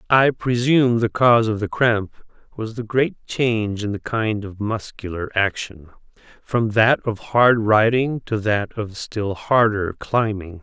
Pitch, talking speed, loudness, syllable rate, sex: 110 Hz, 160 wpm, -20 LUFS, 4.0 syllables/s, male